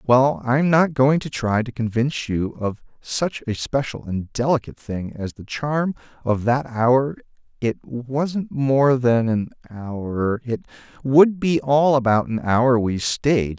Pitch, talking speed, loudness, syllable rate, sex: 125 Hz, 155 wpm, -21 LUFS, 3.8 syllables/s, male